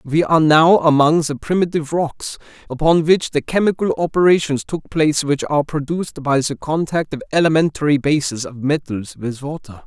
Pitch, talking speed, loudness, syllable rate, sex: 150 Hz, 165 wpm, -17 LUFS, 5.5 syllables/s, male